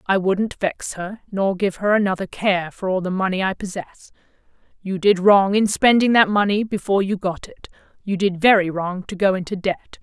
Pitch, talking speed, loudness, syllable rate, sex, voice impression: 195 Hz, 205 wpm, -19 LUFS, 5.0 syllables/s, female, feminine, adult-like, tensed, powerful, slightly bright, clear, slightly muffled, intellectual, friendly, reassuring, lively